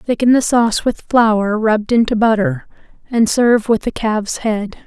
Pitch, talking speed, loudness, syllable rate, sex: 225 Hz, 175 wpm, -15 LUFS, 4.9 syllables/s, female